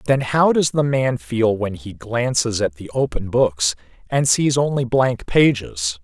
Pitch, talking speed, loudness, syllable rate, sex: 120 Hz, 180 wpm, -19 LUFS, 4.0 syllables/s, male